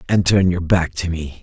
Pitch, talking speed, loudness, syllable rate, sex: 85 Hz, 255 wpm, -18 LUFS, 4.7 syllables/s, male